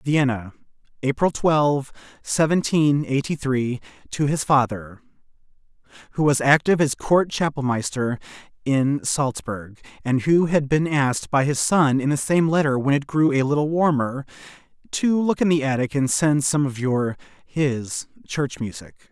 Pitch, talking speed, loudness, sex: 140 Hz, 150 wpm, -21 LUFS, male